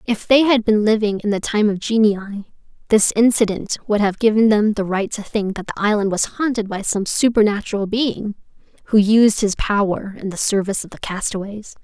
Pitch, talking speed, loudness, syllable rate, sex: 210 Hz, 200 wpm, -18 LUFS, 5.4 syllables/s, female